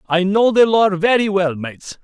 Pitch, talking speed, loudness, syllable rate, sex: 195 Hz, 205 wpm, -15 LUFS, 4.7 syllables/s, male